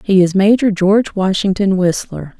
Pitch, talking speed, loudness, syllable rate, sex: 195 Hz, 150 wpm, -14 LUFS, 4.8 syllables/s, female